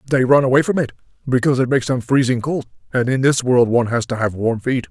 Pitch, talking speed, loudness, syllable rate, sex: 130 Hz, 255 wpm, -17 LUFS, 6.5 syllables/s, male